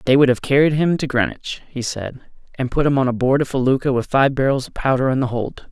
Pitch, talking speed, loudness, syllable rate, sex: 135 Hz, 250 wpm, -19 LUFS, 5.8 syllables/s, male